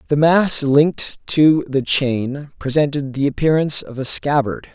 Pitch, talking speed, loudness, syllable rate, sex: 140 Hz, 150 wpm, -17 LUFS, 4.3 syllables/s, male